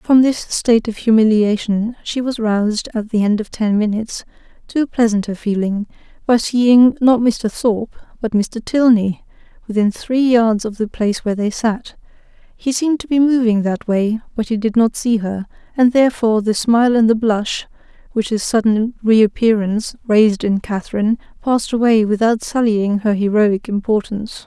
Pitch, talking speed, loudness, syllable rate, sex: 220 Hz, 170 wpm, -16 LUFS, 5.0 syllables/s, female